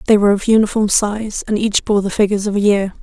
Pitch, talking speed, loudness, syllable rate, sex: 205 Hz, 260 wpm, -15 LUFS, 6.5 syllables/s, female